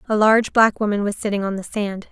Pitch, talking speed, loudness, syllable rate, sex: 210 Hz, 255 wpm, -19 LUFS, 6.2 syllables/s, female